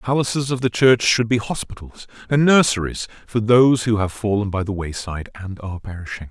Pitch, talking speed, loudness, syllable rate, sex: 110 Hz, 200 wpm, -19 LUFS, 6.0 syllables/s, male